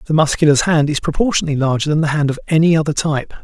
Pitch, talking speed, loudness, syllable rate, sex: 150 Hz, 225 wpm, -16 LUFS, 7.7 syllables/s, male